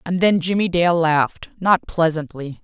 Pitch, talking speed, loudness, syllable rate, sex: 170 Hz, 135 wpm, -19 LUFS, 4.7 syllables/s, female